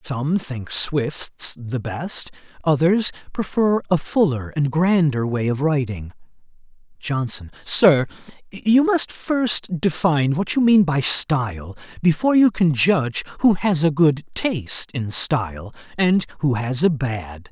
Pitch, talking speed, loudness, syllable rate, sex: 155 Hz, 140 wpm, -20 LUFS, 3.9 syllables/s, male